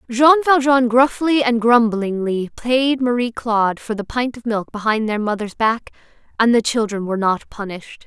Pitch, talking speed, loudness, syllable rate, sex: 230 Hz, 170 wpm, -18 LUFS, 4.8 syllables/s, female